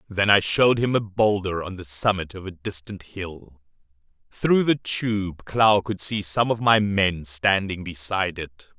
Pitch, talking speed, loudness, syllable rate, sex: 95 Hz, 180 wpm, -22 LUFS, 4.2 syllables/s, male